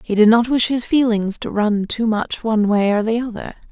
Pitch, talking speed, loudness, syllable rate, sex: 220 Hz, 240 wpm, -18 LUFS, 5.2 syllables/s, female